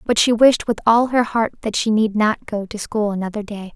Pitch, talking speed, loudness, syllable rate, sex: 215 Hz, 255 wpm, -18 LUFS, 5.1 syllables/s, female